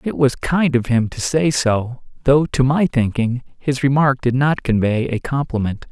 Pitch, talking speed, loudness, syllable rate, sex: 130 Hz, 195 wpm, -18 LUFS, 4.4 syllables/s, male